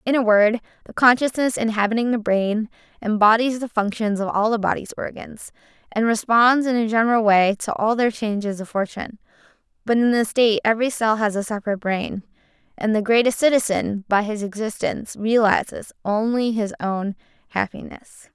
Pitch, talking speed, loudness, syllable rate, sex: 220 Hz, 165 wpm, -20 LUFS, 5.5 syllables/s, female